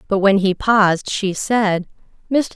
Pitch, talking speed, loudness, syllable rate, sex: 200 Hz, 165 wpm, -17 LUFS, 4.2 syllables/s, female